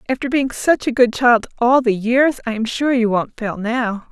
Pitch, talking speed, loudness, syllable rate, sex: 240 Hz, 235 wpm, -17 LUFS, 4.5 syllables/s, female